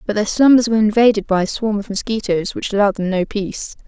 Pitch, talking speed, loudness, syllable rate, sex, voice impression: 210 Hz, 230 wpm, -17 LUFS, 6.5 syllables/s, female, feminine, adult-like, relaxed, weak, fluent, raspy, intellectual, calm, elegant, slightly kind, modest